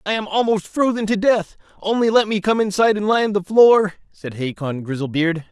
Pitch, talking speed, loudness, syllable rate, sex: 200 Hz, 195 wpm, -18 LUFS, 5.2 syllables/s, male